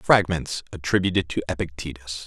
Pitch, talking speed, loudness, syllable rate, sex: 85 Hz, 105 wpm, -25 LUFS, 5.3 syllables/s, male